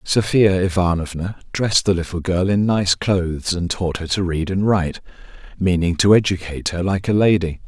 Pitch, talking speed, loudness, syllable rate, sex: 90 Hz, 180 wpm, -19 LUFS, 5.2 syllables/s, male